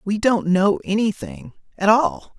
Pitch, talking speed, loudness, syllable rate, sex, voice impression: 190 Hz, 125 wpm, -19 LUFS, 4.1 syllables/s, male, masculine, adult-like, tensed, powerful, bright, clear, raspy, intellectual, friendly, wild, lively, slightly kind